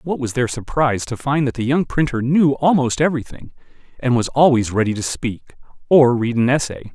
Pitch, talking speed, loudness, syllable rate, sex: 135 Hz, 205 wpm, -18 LUFS, 5.5 syllables/s, male